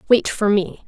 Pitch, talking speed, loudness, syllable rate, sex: 205 Hz, 205 wpm, -18 LUFS, 4.5 syllables/s, female